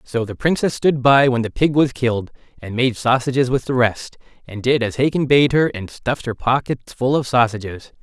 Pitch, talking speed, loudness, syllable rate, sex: 125 Hz, 215 wpm, -18 LUFS, 5.2 syllables/s, male